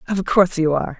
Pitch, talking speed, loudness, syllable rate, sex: 170 Hz, 240 wpm, -18 LUFS, 7.4 syllables/s, female